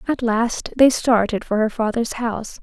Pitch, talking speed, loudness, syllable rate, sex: 230 Hz, 185 wpm, -19 LUFS, 4.5 syllables/s, female